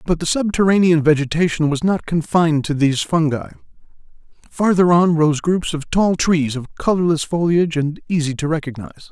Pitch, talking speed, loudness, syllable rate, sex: 160 Hz, 160 wpm, -17 LUFS, 5.5 syllables/s, male